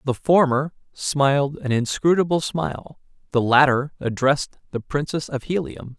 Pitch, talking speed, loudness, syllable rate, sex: 140 Hz, 130 wpm, -21 LUFS, 4.8 syllables/s, male